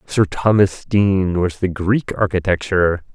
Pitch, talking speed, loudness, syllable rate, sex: 95 Hz, 135 wpm, -17 LUFS, 4.4 syllables/s, male